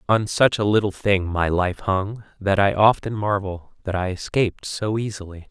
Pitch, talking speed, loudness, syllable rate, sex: 100 Hz, 185 wpm, -21 LUFS, 4.7 syllables/s, male